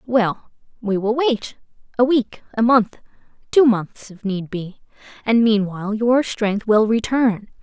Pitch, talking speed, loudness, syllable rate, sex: 225 Hz, 135 wpm, -19 LUFS, 3.9 syllables/s, female